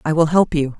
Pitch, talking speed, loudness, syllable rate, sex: 155 Hz, 305 wpm, -16 LUFS, 5.8 syllables/s, female